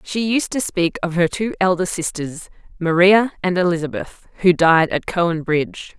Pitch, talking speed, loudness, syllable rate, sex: 180 Hz, 170 wpm, -18 LUFS, 4.8 syllables/s, female